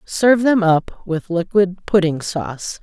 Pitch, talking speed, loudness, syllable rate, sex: 185 Hz, 150 wpm, -18 LUFS, 4.1 syllables/s, female